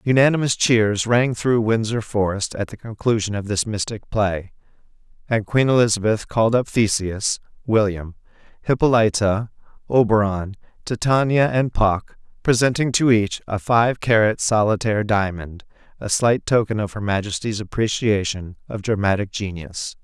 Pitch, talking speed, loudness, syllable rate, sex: 110 Hz, 125 wpm, -20 LUFS, 4.8 syllables/s, male